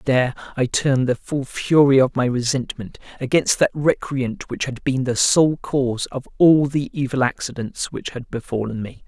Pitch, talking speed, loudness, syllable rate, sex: 130 Hz, 180 wpm, -20 LUFS, 4.7 syllables/s, male